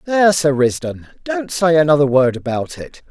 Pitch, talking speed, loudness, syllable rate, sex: 150 Hz, 175 wpm, -16 LUFS, 5.0 syllables/s, male